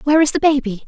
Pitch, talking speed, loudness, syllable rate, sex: 275 Hz, 275 wpm, -16 LUFS, 7.9 syllables/s, female